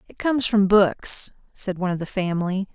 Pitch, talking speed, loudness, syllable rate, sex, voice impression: 195 Hz, 195 wpm, -21 LUFS, 5.6 syllables/s, female, feminine, adult-like, tensed, powerful, bright, clear, friendly, elegant, lively, slightly intense, slightly sharp